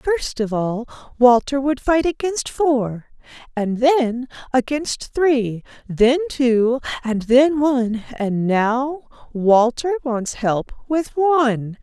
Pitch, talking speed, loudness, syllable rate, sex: 255 Hz, 120 wpm, -19 LUFS, 3.1 syllables/s, female